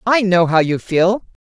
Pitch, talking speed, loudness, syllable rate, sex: 190 Hz, 210 wpm, -15 LUFS, 4.3 syllables/s, female